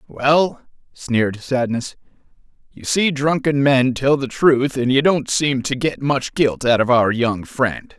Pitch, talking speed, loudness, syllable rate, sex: 135 Hz, 175 wpm, -18 LUFS, 3.8 syllables/s, male